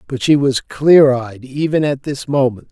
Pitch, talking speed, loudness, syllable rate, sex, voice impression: 135 Hz, 200 wpm, -15 LUFS, 4.3 syllables/s, male, masculine, middle-aged, slightly soft, sincere, slightly calm, slightly wild